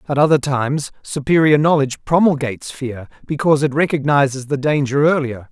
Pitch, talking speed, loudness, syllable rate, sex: 140 Hz, 140 wpm, -17 LUFS, 5.7 syllables/s, male